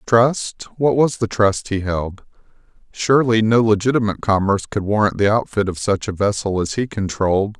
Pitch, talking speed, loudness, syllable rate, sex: 105 Hz, 165 wpm, -18 LUFS, 5.3 syllables/s, male